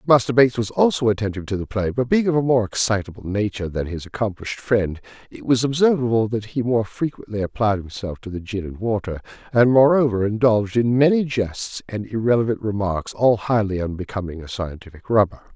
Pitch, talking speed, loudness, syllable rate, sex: 110 Hz, 185 wpm, -21 LUFS, 5.9 syllables/s, male